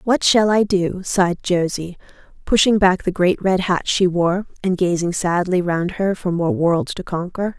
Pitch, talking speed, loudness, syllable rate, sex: 180 Hz, 190 wpm, -18 LUFS, 4.4 syllables/s, female